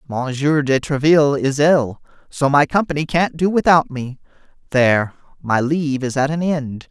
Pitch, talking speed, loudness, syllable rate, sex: 145 Hz, 165 wpm, -17 LUFS, 4.8 syllables/s, male